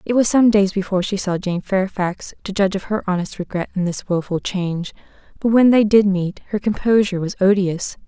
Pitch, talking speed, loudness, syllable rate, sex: 195 Hz, 210 wpm, -19 LUFS, 5.7 syllables/s, female